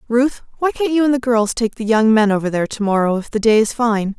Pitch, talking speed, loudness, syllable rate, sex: 230 Hz, 285 wpm, -17 LUFS, 6.0 syllables/s, female